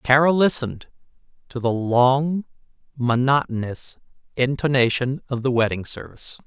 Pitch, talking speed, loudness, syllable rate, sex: 130 Hz, 100 wpm, -21 LUFS, 4.8 syllables/s, male